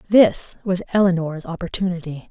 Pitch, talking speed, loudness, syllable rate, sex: 175 Hz, 105 wpm, -20 LUFS, 5.1 syllables/s, female